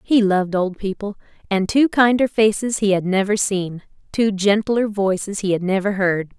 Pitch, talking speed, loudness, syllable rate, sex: 200 Hz, 170 wpm, -19 LUFS, 4.8 syllables/s, female